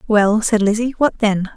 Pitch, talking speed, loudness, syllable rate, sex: 215 Hz, 155 wpm, -16 LUFS, 4.4 syllables/s, female